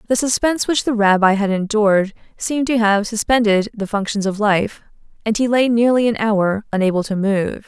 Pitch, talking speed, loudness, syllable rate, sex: 215 Hz, 190 wpm, -17 LUFS, 5.4 syllables/s, female